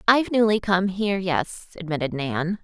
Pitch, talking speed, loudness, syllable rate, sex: 185 Hz, 160 wpm, -23 LUFS, 5.1 syllables/s, female